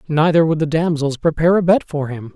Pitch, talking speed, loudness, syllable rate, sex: 155 Hz, 230 wpm, -17 LUFS, 5.9 syllables/s, male